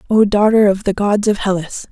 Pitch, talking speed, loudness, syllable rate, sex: 205 Hz, 220 wpm, -15 LUFS, 5.3 syllables/s, female